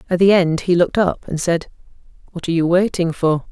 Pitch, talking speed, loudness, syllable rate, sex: 175 Hz, 220 wpm, -17 LUFS, 6.0 syllables/s, female